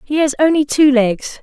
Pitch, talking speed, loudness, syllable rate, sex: 280 Hz, 210 wpm, -14 LUFS, 4.7 syllables/s, female